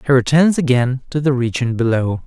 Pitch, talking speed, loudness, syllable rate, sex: 130 Hz, 185 wpm, -16 LUFS, 5.3 syllables/s, male